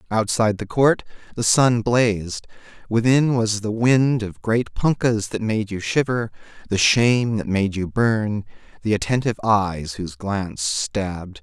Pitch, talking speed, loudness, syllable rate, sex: 110 Hz, 145 wpm, -21 LUFS, 4.4 syllables/s, male